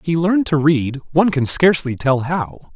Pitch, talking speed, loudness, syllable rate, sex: 155 Hz, 195 wpm, -17 LUFS, 5.2 syllables/s, male